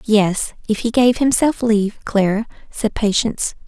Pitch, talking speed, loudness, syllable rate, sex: 220 Hz, 145 wpm, -18 LUFS, 4.6 syllables/s, female